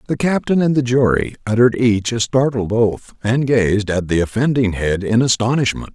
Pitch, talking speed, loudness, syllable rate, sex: 115 Hz, 180 wpm, -17 LUFS, 5.0 syllables/s, male